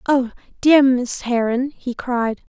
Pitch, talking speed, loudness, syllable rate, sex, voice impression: 250 Hz, 140 wpm, -19 LUFS, 3.6 syllables/s, female, feminine, slightly adult-like, slightly cute, slightly refreshing, friendly